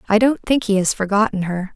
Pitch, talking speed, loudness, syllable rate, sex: 205 Hz, 240 wpm, -18 LUFS, 5.7 syllables/s, female